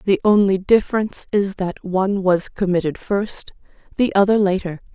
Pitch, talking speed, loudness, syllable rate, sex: 195 Hz, 145 wpm, -19 LUFS, 5.0 syllables/s, female